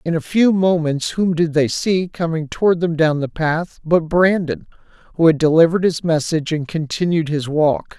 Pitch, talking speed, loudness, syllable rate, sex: 165 Hz, 190 wpm, -17 LUFS, 4.9 syllables/s, male